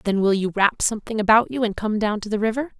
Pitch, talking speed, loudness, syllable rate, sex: 215 Hz, 280 wpm, -21 LUFS, 6.6 syllables/s, female